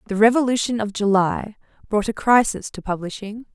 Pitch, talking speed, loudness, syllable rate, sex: 215 Hz, 150 wpm, -20 LUFS, 5.4 syllables/s, female